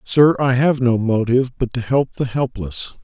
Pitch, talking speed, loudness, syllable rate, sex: 125 Hz, 200 wpm, -18 LUFS, 4.6 syllables/s, male